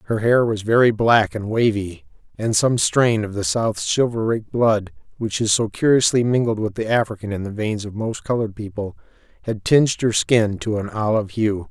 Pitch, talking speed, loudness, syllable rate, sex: 110 Hz, 195 wpm, -20 LUFS, 5.1 syllables/s, male